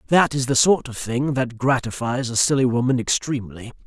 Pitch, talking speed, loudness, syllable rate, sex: 125 Hz, 185 wpm, -20 LUFS, 5.4 syllables/s, male